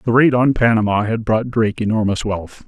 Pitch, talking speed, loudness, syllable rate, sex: 110 Hz, 200 wpm, -17 LUFS, 5.3 syllables/s, male